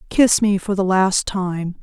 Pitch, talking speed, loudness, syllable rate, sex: 190 Hz, 200 wpm, -18 LUFS, 3.7 syllables/s, female